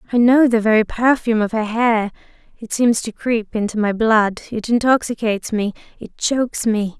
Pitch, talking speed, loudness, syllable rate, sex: 225 Hz, 180 wpm, -18 LUFS, 5.2 syllables/s, female